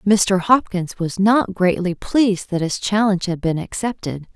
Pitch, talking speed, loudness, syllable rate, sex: 190 Hz, 165 wpm, -19 LUFS, 4.5 syllables/s, female